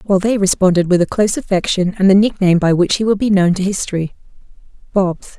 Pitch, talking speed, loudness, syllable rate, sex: 190 Hz, 200 wpm, -15 LUFS, 6.6 syllables/s, female